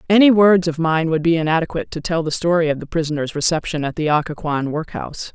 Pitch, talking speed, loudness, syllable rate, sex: 160 Hz, 215 wpm, -18 LUFS, 6.4 syllables/s, female